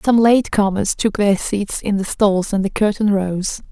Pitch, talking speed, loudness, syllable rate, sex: 205 Hz, 195 wpm, -17 LUFS, 4.5 syllables/s, female